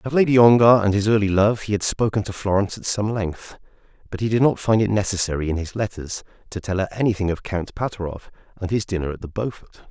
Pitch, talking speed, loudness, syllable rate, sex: 100 Hz, 230 wpm, -21 LUFS, 6.4 syllables/s, male